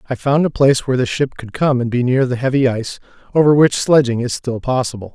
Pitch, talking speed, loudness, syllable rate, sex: 130 Hz, 245 wpm, -16 LUFS, 6.4 syllables/s, male